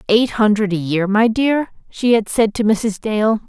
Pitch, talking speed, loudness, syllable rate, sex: 215 Hz, 205 wpm, -17 LUFS, 4.3 syllables/s, female